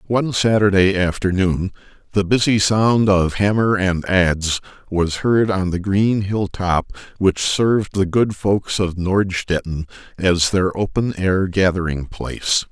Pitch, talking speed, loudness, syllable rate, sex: 95 Hz, 140 wpm, -18 LUFS, 4.0 syllables/s, male